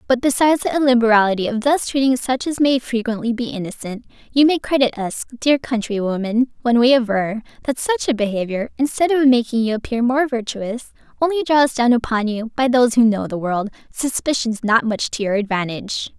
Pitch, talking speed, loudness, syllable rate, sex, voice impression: 240 Hz, 185 wpm, -18 LUFS, 5.6 syllables/s, female, very feminine, young, slightly adult-like, very thin, tensed, slightly powerful, very bright, hard, very clear, very fluent, slightly raspy, very cute, slightly cool, intellectual, very refreshing, sincere, slightly calm, very friendly, very reassuring, very unique, very elegant, slightly wild, sweet, very lively, strict, intense, slightly sharp, very light